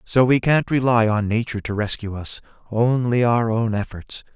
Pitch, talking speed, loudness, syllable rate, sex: 115 Hz, 180 wpm, -20 LUFS, 4.7 syllables/s, male